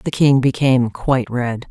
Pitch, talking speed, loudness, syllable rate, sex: 125 Hz, 175 wpm, -17 LUFS, 4.9 syllables/s, female